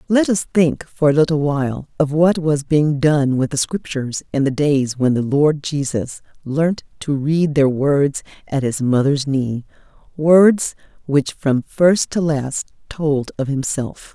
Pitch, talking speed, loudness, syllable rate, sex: 145 Hz, 170 wpm, -18 LUFS, 3.9 syllables/s, female